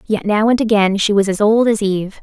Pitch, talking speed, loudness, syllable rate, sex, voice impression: 210 Hz, 270 wpm, -15 LUFS, 5.7 syllables/s, female, very feminine, young, very thin, tensed, very powerful, very bright, slightly soft, very clear, very fluent, slightly raspy, very cute, very intellectual, refreshing, sincere, calm, very friendly, very reassuring, very unique, very elegant, slightly wild, very sweet, very lively, kind, slightly intense, slightly sharp, light